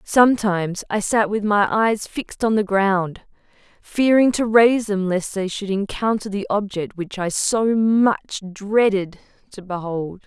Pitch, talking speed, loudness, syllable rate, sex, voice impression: 205 Hz, 160 wpm, -20 LUFS, 4.3 syllables/s, female, very feminine, very adult-like, middle-aged, slightly thin, slightly tensed, powerful, slightly bright, slightly soft, clear, fluent, slightly cute, cool, intellectual, refreshing, sincere, very calm, friendly, very reassuring, very unique, very elegant, wild, very sweet, very kind, very modest